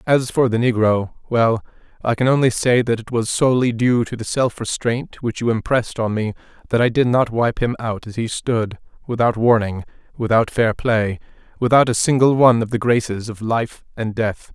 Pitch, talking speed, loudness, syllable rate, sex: 115 Hz, 190 wpm, -19 LUFS, 5.1 syllables/s, male